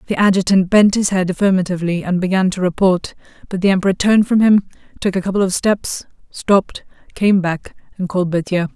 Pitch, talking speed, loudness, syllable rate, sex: 190 Hz, 185 wpm, -16 LUFS, 6.0 syllables/s, female